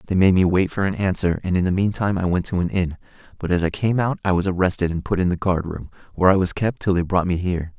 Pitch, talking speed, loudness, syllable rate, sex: 90 Hz, 310 wpm, -21 LUFS, 6.6 syllables/s, male